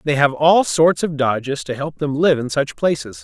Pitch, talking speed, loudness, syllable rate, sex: 140 Hz, 240 wpm, -18 LUFS, 4.8 syllables/s, male